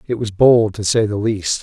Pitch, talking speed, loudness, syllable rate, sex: 110 Hz, 260 wpm, -16 LUFS, 4.6 syllables/s, male